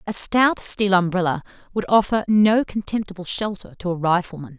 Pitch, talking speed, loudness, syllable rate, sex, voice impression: 190 Hz, 155 wpm, -20 LUFS, 5.2 syllables/s, female, feminine, adult-like, tensed, powerful, hard, clear, slightly nasal, intellectual, slightly friendly, unique, slightly elegant, lively, strict, sharp